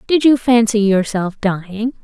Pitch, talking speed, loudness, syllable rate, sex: 220 Hz, 145 wpm, -15 LUFS, 4.4 syllables/s, female